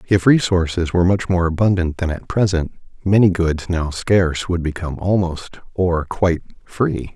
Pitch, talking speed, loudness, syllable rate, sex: 90 Hz, 160 wpm, -18 LUFS, 5.0 syllables/s, male